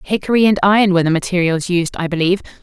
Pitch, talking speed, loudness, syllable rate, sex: 185 Hz, 205 wpm, -15 LUFS, 7.3 syllables/s, female